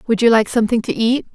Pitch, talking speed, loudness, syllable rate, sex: 230 Hz, 270 wpm, -16 LUFS, 7.1 syllables/s, female